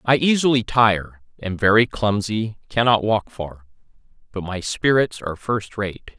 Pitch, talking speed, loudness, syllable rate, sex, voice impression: 105 Hz, 145 wpm, -20 LUFS, 4.3 syllables/s, male, masculine, adult-like, tensed, powerful, bright, clear, slightly nasal, cool, intellectual, calm, mature, reassuring, wild, lively, slightly strict